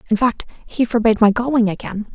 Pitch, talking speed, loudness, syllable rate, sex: 225 Hz, 195 wpm, -17 LUFS, 5.5 syllables/s, female